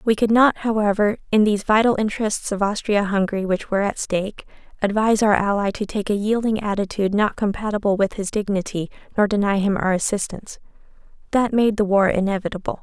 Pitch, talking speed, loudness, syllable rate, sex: 205 Hz, 180 wpm, -20 LUFS, 6.1 syllables/s, female